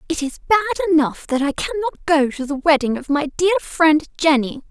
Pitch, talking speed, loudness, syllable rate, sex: 305 Hz, 205 wpm, -18 LUFS, 5.9 syllables/s, female